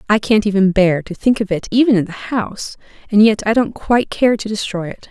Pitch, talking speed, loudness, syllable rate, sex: 210 Hz, 245 wpm, -16 LUFS, 5.7 syllables/s, female